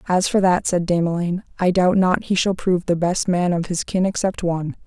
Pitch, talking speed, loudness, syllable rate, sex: 180 Hz, 245 wpm, -20 LUFS, 5.6 syllables/s, female